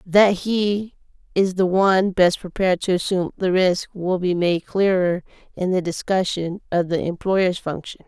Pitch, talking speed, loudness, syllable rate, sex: 185 Hz, 165 wpm, -21 LUFS, 4.5 syllables/s, female